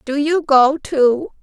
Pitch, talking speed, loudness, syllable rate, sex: 285 Hz, 170 wpm, -15 LUFS, 3.4 syllables/s, female